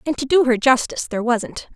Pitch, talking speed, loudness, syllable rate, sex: 260 Hz, 240 wpm, -18 LUFS, 6.3 syllables/s, female